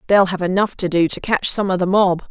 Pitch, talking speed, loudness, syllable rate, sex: 185 Hz, 285 wpm, -17 LUFS, 5.7 syllables/s, female